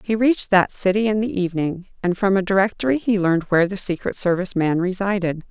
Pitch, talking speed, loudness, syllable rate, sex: 195 Hz, 205 wpm, -20 LUFS, 6.3 syllables/s, female